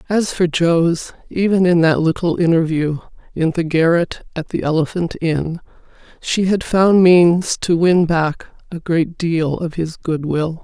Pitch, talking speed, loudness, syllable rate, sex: 170 Hz, 165 wpm, -17 LUFS, 3.9 syllables/s, female